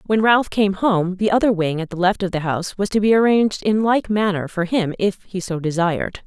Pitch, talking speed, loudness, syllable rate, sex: 195 Hz, 250 wpm, -19 LUFS, 5.5 syllables/s, female